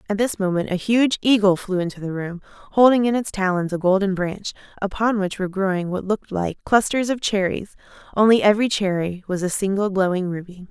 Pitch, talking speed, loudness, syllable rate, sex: 195 Hz, 195 wpm, -21 LUFS, 5.8 syllables/s, female